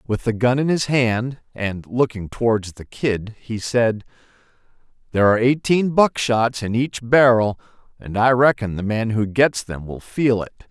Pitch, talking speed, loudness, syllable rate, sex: 115 Hz, 175 wpm, -19 LUFS, 4.5 syllables/s, male